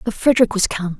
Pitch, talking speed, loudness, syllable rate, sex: 210 Hz, 240 wpm, -17 LUFS, 6.7 syllables/s, female